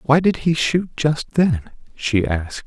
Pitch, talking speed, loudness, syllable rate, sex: 140 Hz, 180 wpm, -20 LUFS, 3.9 syllables/s, male